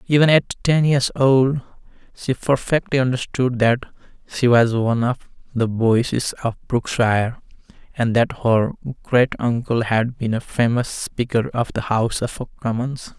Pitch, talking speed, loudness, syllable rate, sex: 125 Hz, 145 wpm, -20 LUFS, 4.3 syllables/s, male